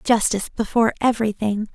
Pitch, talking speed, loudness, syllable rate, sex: 220 Hz, 105 wpm, -21 LUFS, 7.1 syllables/s, female